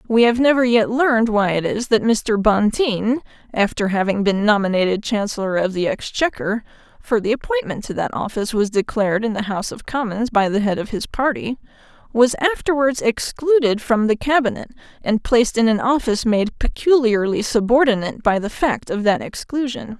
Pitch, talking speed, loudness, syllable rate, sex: 225 Hz, 170 wpm, -19 LUFS, 5.3 syllables/s, female